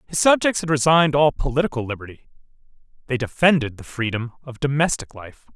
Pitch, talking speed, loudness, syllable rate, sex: 140 Hz, 150 wpm, -20 LUFS, 6.1 syllables/s, male